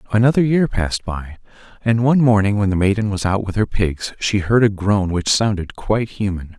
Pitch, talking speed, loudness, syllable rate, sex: 105 Hz, 210 wpm, -18 LUFS, 5.5 syllables/s, male